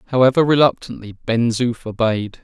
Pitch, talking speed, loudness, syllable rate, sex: 120 Hz, 125 wpm, -17 LUFS, 5.0 syllables/s, male